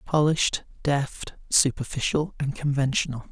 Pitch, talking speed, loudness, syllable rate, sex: 140 Hz, 90 wpm, -25 LUFS, 4.6 syllables/s, male